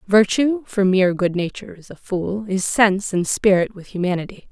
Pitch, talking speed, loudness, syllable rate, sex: 195 Hz, 185 wpm, -19 LUFS, 3.7 syllables/s, female